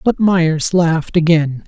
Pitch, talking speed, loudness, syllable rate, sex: 165 Hz, 145 wpm, -14 LUFS, 3.8 syllables/s, male